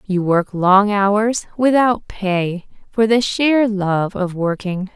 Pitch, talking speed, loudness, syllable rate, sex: 200 Hz, 145 wpm, -17 LUFS, 3.1 syllables/s, female